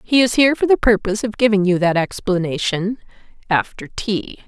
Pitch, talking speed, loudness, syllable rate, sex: 210 Hz, 160 wpm, -18 LUFS, 5.5 syllables/s, female